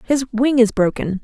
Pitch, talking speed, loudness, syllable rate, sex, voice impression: 240 Hz, 195 wpm, -17 LUFS, 4.7 syllables/s, female, feminine, very adult-like, slightly soft, calm, slightly reassuring, elegant